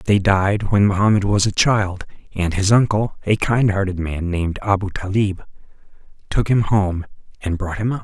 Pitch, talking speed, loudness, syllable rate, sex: 100 Hz, 185 wpm, -19 LUFS, 5.0 syllables/s, male